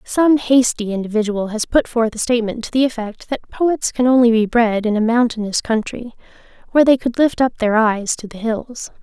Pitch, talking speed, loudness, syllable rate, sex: 235 Hz, 205 wpm, -17 LUFS, 5.3 syllables/s, female